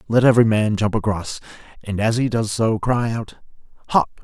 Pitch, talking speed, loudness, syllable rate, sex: 110 Hz, 185 wpm, -19 LUFS, 5.2 syllables/s, male